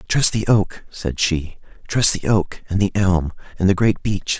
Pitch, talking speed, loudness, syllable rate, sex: 95 Hz, 205 wpm, -19 LUFS, 4.1 syllables/s, male